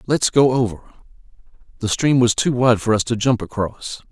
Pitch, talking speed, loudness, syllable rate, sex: 120 Hz, 190 wpm, -18 LUFS, 5.2 syllables/s, male